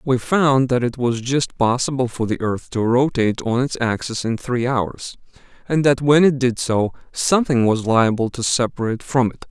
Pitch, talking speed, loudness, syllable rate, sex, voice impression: 125 Hz, 195 wpm, -19 LUFS, 4.9 syllables/s, male, very masculine, very middle-aged, very thick, tensed, powerful, slightly bright, soft, clear, fluent, cool, very intellectual, refreshing, sincere, very calm, mature, very friendly, very reassuring, unique, elegant, slightly wild, sweet, lively, kind, modest